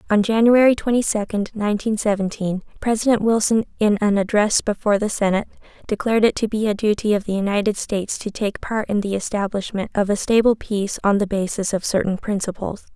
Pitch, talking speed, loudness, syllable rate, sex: 210 Hz, 185 wpm, -20 LUFS, 6.0 syllables/s, female